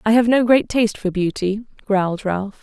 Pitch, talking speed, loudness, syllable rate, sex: 210 Hz, 205 wpm, -19 LUFS, 5.2 syllables/s, female